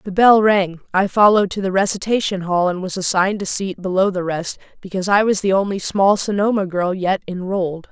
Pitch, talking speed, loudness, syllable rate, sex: 190 Hz, 205 wpm, -18 LUFS, 5.7 syllables/s, female